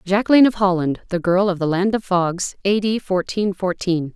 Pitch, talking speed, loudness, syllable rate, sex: 190 Hz, 200 wpm, -19 LUFS, 5.2 syllables/s, female